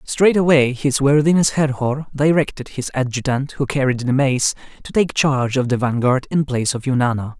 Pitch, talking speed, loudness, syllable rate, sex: 135 Hz, 170 wpm, -18 LUFS, 5.1 syllables/s, male